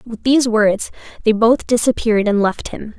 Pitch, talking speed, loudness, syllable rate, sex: 220 Hz, 180 wpm, -16 LUFS, 5.1 syllables/s, female